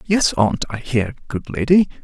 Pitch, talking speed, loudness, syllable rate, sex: 135 Hz, 175 wpm, -19 LUFS, 4.4 syllables/s, male